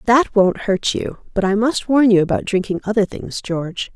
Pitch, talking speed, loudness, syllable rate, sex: 210 Hz, 210 wpm, -18 LUFS, 5.0 syllables/s, female